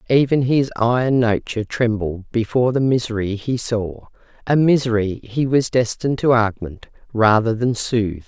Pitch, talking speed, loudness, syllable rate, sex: 115 Hz, 140 wpm, -19 LUFS, 4.8 syllables/s, female